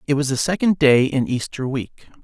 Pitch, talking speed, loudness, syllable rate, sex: 135 Hz, 215 wpm, -19 LUFS, 5.0 syllables/s, male